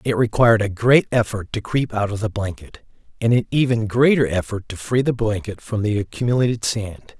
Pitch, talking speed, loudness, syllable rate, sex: 110 Hz, 200 wpm, -20 LUFS, 5.4 syllables/s, male